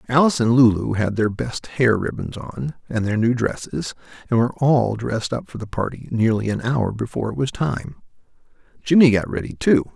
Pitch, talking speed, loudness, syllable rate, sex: 115 Hz, 195 wpm, -20 LUFS, 5.4 syllables/s, male